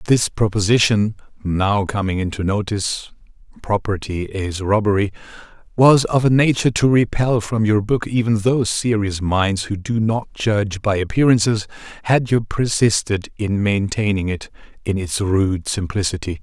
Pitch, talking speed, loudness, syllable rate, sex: 105 Hz, 130 wpm, -19 LUFS, 4.7 syllables/s, male